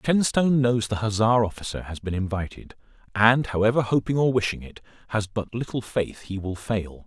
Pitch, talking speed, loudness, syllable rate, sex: 110 Hz, 180 wpm, -24 LUFS, 5.3 syllables/s, male